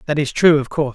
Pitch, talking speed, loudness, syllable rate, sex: 145 Hz, 315 wpm, -16 LUFS, 7.1 syllables/s, male